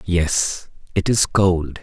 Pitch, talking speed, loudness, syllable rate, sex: 90 Hz, 130 wpm, -19 LUFS, 2.7 syllables/s, male